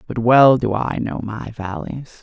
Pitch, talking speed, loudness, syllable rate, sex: 115 Hz, 190 wpm, -18 LUFS, 4.0 syllables/s, male